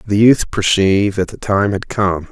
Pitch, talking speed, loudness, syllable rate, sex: 100 Hz, 210 wpm, -15 LUFS, 4.6 syllables/s, male